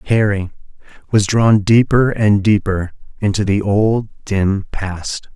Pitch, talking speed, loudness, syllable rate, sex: 105 Hz, 125 wpm, -16 LUFS, 3.7 syllables/s, male